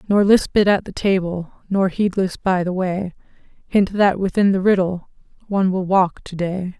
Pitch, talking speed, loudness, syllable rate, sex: 190 Hz, 185 wpm, -19 LUFS, 4.6 syllables/s, female